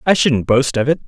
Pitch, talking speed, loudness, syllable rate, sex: 135 Hz, 280 wpm, -15 LUFS, 5.5 syllables/s, male